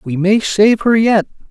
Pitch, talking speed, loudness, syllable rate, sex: 205 Hz, 200 wpm, -13 LUFS, 4.0 syllables/s, male